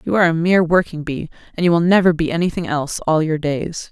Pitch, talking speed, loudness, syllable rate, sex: 165 Hz, 245 wpm, -17 LUFS, 6.4 syllables/s, female